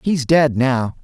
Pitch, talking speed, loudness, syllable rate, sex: 135 Hz, 175 wpm, -16 LUFS, 3.3 syllables/s, male